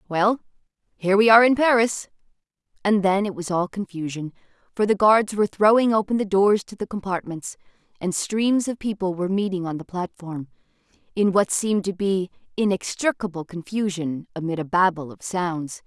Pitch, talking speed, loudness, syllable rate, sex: 195 Hz, 165 wpm, -22 LUFS, 5.3 syllables/s, female